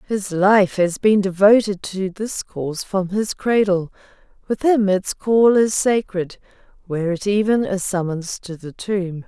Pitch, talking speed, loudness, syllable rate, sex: 195 Hz, 160 wpm, -19 LUFS, 4.1 syllables/s, female